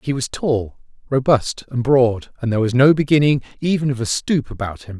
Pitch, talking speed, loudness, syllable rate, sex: 130 Hz, 205 wpm, -18 LUFS, 5.4 syllables/s, male